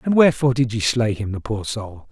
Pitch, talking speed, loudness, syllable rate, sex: 115 Hz, 255 wpm, -20 LUFS, 6.0 syllables/s, male